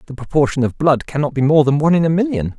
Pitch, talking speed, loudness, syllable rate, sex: 150 Hz, 280 wpm, -16 LUFS, 7.0 syllables/s, male